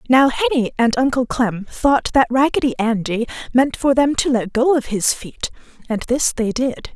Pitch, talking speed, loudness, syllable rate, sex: 250 Hz, 190 wpm, -18 LUFS, 4.6 syllables/s, female